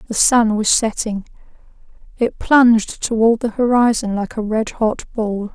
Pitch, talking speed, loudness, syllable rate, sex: 225 Hz, 140 wpm, -17 LUFS, 4.9 syllables/s, female